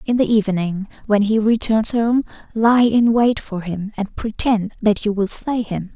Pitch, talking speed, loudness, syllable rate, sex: 215 Hz, 190 wpm, -18 LUFS, 4.4 syllables/s, female